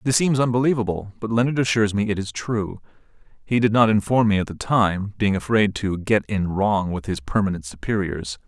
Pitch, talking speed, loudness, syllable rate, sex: 105 Hz, 200 wpm, -21 LUFS, 5.4 syllables/s, male